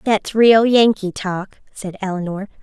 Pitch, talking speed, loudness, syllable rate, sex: 205 Hz, 135 wpm, -17 LUFS, 4.1 syllables/s, female